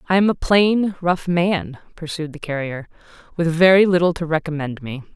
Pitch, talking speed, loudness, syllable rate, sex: 165 Hz, 175 wpm, -19 LUFS, 5.0 syllables/s, female